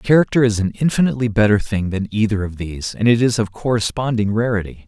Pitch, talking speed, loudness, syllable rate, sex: 110 Hz, 195 wpm, -18 LUFS, 6.3 syllables/s, male